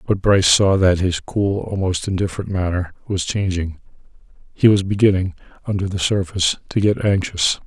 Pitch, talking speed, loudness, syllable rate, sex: 95 Hz, 150 wpm, -19 LUFS, 5.3 syllables/s, male